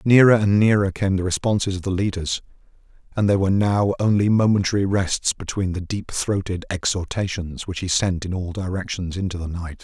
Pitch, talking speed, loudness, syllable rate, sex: 95 Hz, 185 wpm, -21 LUFS, 5.5 syllables/s, male